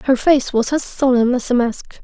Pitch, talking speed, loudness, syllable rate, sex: 255 Hz, 235 wpm, -17 LUFS, 4.8 syllables/s, female